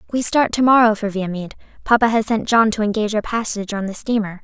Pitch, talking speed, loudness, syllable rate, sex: 215 Hz, 230 wpm, -18 LUFS, 6.6 syllables/s, female